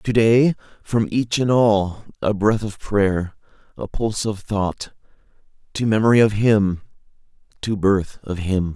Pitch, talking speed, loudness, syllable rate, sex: 105 Hz, 135 wpm, -20 LUFS, 4.0 syllables/s, male